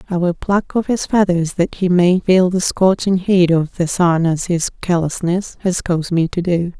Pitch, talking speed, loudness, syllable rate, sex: 180 Hz, 210 wpm, -16 LUFS, 4.7 syllables/s, female